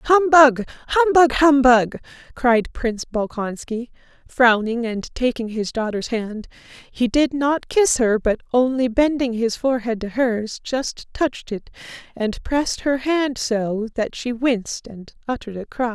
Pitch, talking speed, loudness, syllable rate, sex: 245 Hz, 145 wpm, -20 LUFS, 4.2 syllables/s, female